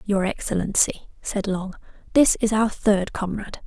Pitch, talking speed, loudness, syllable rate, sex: 200 Hz, 145 wpm, -22 LUFS, 4.7 syllables/s, female